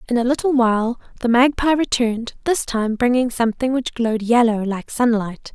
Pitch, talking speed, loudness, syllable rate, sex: 240 Hz, 175 wpm, -19 LUFS, 5.4 syllables/s, female